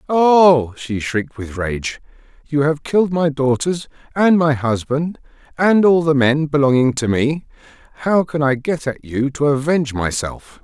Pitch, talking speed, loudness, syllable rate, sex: 140 Hz, 165 wpm, -17 LUFS, 4.4 syllables/s, male